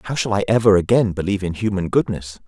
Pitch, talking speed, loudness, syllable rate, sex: 100 Hz, 220 wpm, -19 LUFS, 6.8 syllables/s, male